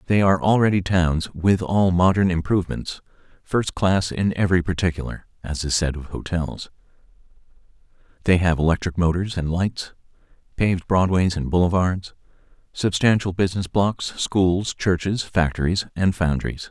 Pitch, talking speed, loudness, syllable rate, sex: 90 Hz, 125 wpm, -21 LUFS, 4.9 syllables/s, male